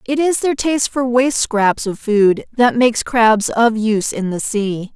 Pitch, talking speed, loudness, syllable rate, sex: 230 Hz, 205 wpm, -16 LUFS, 4.5 syllables/s, female